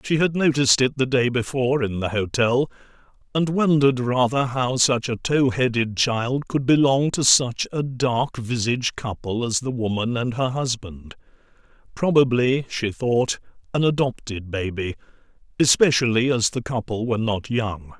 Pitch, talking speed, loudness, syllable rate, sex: 125 Hz, 150 wpm, -21 LUFS, 4.6 syllables/s, male